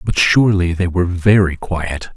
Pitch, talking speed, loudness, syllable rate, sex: 90 Hz, 165 wpm, -15 LUFS, 5.0 syllables/s, male